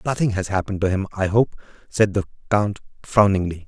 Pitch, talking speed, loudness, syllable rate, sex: 100 Hz, 180 wpm, -21 LUFS, 6.0 syllables/s, male